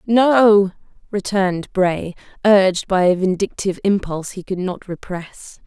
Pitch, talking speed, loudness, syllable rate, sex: 190 Hz, 125 wpm, -18 LUFS, 4.4 syllables/s, female